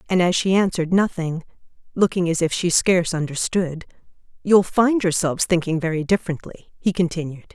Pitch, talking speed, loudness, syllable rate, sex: 175 Hz, 150 wpm, -20 LUFS, 5.8 syllables/s, female